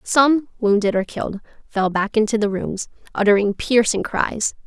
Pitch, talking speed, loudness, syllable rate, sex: 215 Hz, 155 wpm, -20 LUFS, 4.7 syllables/s, female